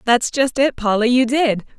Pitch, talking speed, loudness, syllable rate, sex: 245 Hz, 200 wpm, -17 LUFS, 4.6 syllables/s, female